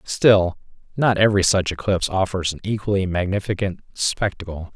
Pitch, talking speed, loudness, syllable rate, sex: 95 Hz, 125 wpm, -20 LUFS, 5.4 syllables/s, male